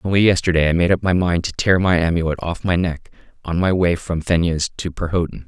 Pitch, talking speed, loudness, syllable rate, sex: 85 Hz, 240 wpm, -19 LUFS, 6.0 syllables/s, male